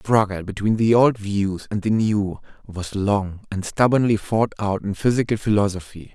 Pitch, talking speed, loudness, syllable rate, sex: 105 Hz, 175 wpm, -21 LUFS, 4.7 syllables/s, male